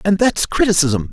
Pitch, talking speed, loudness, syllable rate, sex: 180 Hz, 160 wpm, -16 LUFS, 5.0 syllables/s, male